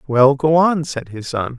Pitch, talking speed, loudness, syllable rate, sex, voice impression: 140 Hz, 225 wpm, -17 LUFS, 4.2 syllables/s, male, masculine, adult-like, tensed, slightly bright, clear, cool, slightly refreshing, sincere, slightly calm, friendly, slightly reassuring, slightly wild, kind, slightly modest